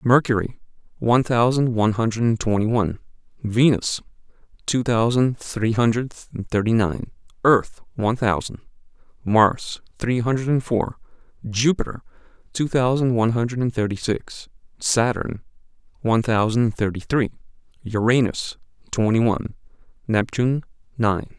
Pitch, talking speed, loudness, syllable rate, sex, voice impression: 115 Hz, 105 wpm, -21 LUFS, 4.6 syllables/s, male, very masculine, very middle-aged, very thick, tensed, powerful, slightly bright, soft, clear, fluent, cool, very intellectual, refreshing, sincere, very calm, mature, very friendly, very reassuring, unique, elegant, slightly wild, sweet, lively, kind, modest